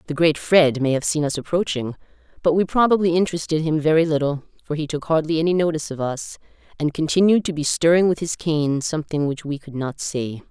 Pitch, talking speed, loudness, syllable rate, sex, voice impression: 155 Hz, 210 wpm, -21 LUFS, 6.0 syllables/s, female, feminine, slightly middle-aged, intellectual, elegant, slightly strict